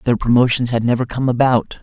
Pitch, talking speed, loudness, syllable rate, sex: 120 Hz, 195 wpm, -16 LUFS, 6.0 syllables/s, male